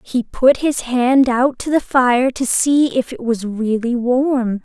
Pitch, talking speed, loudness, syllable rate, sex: 250 Hz, 195 wpm, -16 LUFS, 3.5 syllables/s, female